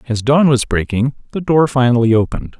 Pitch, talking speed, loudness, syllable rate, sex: 125 Hz, 185 wpm, -15 LUFS, 5.9 syllables/s, male